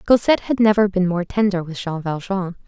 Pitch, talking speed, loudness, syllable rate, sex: 190 Hz, 200 wpm, -19 LUFS, 5.7 syllables/s, female